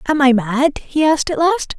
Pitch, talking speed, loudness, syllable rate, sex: 290 Hz, 235 wpm, -16 LUFS, 4.9 syllables/s, female